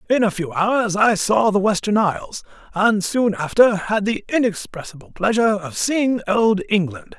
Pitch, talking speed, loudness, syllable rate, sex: 205 Hz, 165 wpm, -19 LUFS, 4.6 syllables/s, male